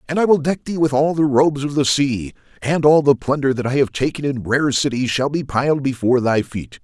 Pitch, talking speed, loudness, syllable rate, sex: 140 Hz, 255 wpm, -18 LUFS, 5.7 syllables/s, male